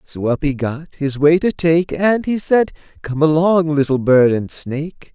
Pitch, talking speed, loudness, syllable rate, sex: 155 Hz, 200 wpm, -16 LUFS, 4.3 syllables/s, male